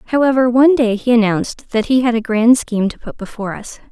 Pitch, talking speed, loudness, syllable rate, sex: 235 Hz, 230 wpm, -15 LUFS, 6.1 syllables/s, female